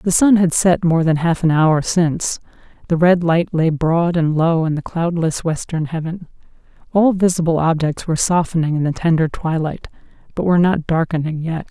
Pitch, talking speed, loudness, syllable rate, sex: 165 Hz, 185 wpm, -17 LUFS, 5.1 syllables/s, female